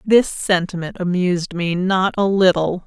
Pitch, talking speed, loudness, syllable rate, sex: 185 Hz, 145 wpm, -18 LUFS, 4.4 syllables/s, female